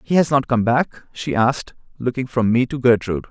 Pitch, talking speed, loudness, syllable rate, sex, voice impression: 120 Hz, 220 wpm, -19 LUFS, 5.5 syllables/s, male, masculine, very adult-like, middle-aged, thick, slightly relaxed, slightly weak, bright, slightly soft, clear, very fluent, cool, very intellectual, slightly refreshing, sincere, very calm, slightly mature, friendly, very reassuring, slightly unique, very elegant, slightly sweet, lively, kind, slightly modest